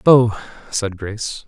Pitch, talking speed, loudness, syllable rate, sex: 110 Hz, 120 wpm, -19 LUFS, 4.0 syllables/s, male